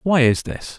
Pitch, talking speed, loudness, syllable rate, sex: 145 Hz, 230 wpm, -18 LUFS, 4.4 syllables/s, male